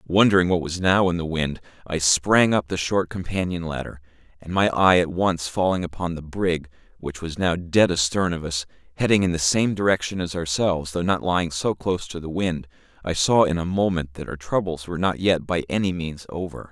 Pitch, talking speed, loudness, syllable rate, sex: 85 Hz, 215 wpm, -22 LUFS, 4.6 syllables/s, male